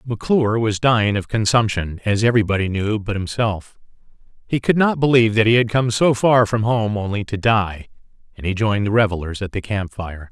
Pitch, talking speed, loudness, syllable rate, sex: 110 Hz, 200 wpm, -18 LUFS, 5.7 syllables/s, male